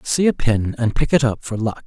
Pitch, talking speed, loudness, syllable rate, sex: 120 Hz, 290 wpm, -19 LUFS, 5.2 syllables/s, male